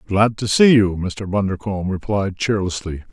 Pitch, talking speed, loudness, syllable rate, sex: 100 Hz, 155 wpm, -19 LUFS, 4.9 syllables/s, male